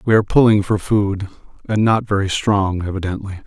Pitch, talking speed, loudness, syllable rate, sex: 100 Hz, 175 wpm, -17 LUFS, 5.7 syllables/s, male